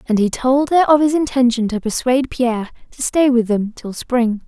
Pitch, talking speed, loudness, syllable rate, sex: 245 Hz, 215 wpm, -17 LUFS, 5.2 syllables/s, female